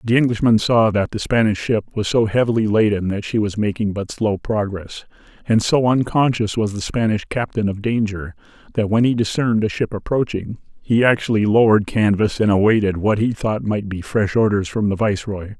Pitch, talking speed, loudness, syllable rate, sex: 105 Hz, 190 wpm, -18 LUFS, 5.4 syllables/s, male